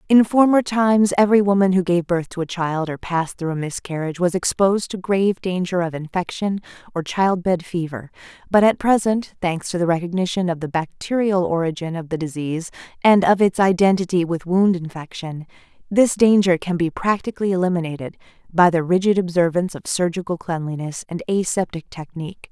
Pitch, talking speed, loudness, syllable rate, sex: 180 Hz, 165 wpm, -20 LUFS, 5.6 syllables/s, female